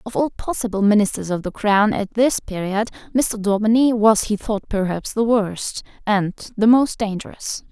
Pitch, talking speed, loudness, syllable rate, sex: 210 Hz, 170 wpm, -19 LUFS, 4.6 syllables/s, female